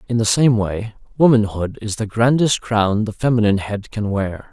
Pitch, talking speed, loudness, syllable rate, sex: 110 Hz, 185 wpm, -18 LUFS, 4.9 syllables/s, male